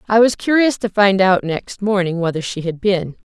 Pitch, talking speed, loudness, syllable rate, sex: 195 Hz, 220 wpm, -17 LUFS, 5.0 syllables/s, female